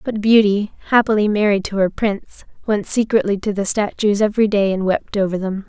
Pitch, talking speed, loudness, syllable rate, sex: 205 Hz, 190 wpm, -17 LUFS, 5.6 syllables/s, female